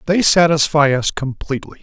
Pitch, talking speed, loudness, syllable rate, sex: 150 Hz, 130 wpm, -15 LUFS, 5.4 syllables/s, male